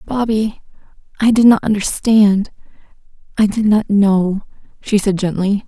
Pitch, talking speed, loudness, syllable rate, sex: 205 Hz, 115 wpm, -15 LUFS, 4.3 syllables/s, female